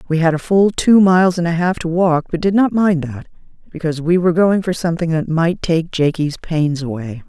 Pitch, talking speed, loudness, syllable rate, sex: 170 Hz, 230 wpm, -16 LUFS, 5.6 syllables/s, female